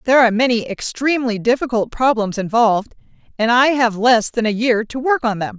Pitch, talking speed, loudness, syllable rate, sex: 235 Hz, 195 wpm, -17 LUFS, 5.8 syllables/s, female